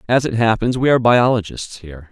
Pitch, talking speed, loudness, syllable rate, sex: 115 Hz, 200 wpm, -16 LUFS, 6.2 syllables/s, male